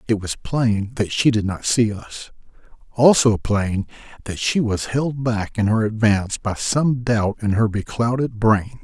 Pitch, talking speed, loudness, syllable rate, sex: 110 Hz, 175 wpm, -20 LUFS, 4.2 syllables/s, male